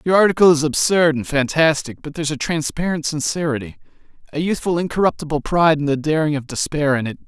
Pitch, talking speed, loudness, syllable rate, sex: 155 Hz, 180 wpm, -18 LUFS, 6.3 syllables/s, male